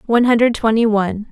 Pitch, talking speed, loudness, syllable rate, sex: 225 Hz, 185 wpm, -15 LUFS, 6.8 syllables/s, female